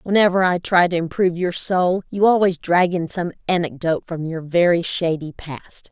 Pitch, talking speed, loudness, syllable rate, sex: 175 Hz, 185 wpm, -19 LUFS, 5.0 syllables/s, female